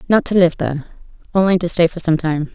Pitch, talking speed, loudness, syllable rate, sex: 170 Hz, 235 wpm, -17 LUFS, 6.1 syllables/s, female